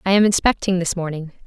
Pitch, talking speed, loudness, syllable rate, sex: 185 Hz, 205 wpm, -19 LUFS, 6.4 syllables/s, female